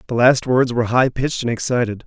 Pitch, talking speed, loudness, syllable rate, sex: 125 Hz, 230 wpm, -18 LUFS, 6.4 syllables/s, male